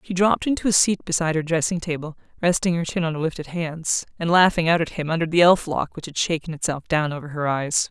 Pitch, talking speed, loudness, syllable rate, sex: 165 Hz, 250 wpm, -22 LUFS, 6.2 syllables/s, female